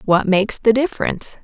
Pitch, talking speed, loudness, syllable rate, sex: 220 Hz, 165 wpm, -17 LUFS, 6.2 syllables/s, female